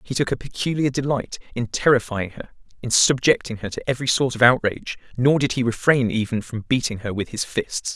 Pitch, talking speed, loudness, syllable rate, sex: 120 Hz, 205 wpm, -21 LUFS, 5.7 syllables/s, male